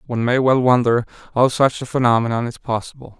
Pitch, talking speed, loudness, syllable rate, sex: 125 Hz, 190 wpm, -18 LUFS, 6.3 syllables/s, male